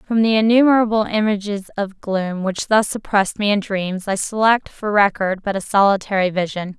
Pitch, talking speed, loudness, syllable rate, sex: 205 Hz, 175 wpm, -18 LUFS, 5.2 syllables/s, female